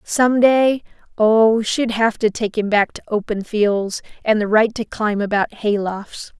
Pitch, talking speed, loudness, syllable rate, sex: 215 Hz, 180 wpm, -18 LUFS, 3.9 syllables/s, female